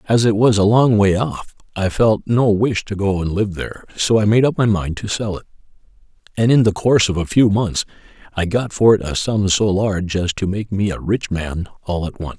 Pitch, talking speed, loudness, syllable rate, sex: 100 Hz, 245 wpm, -17 LUFS, 5.2 syllables/s, male